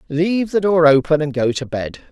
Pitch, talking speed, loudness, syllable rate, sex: 155 Hz, 225 wpm, -17 LUFS, 5.4 syllables/s, male